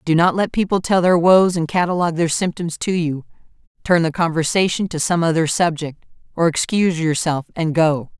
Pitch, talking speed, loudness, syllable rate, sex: 170 Hz, 185 wpm, -18 LUFS, 5.3 syllables/s, female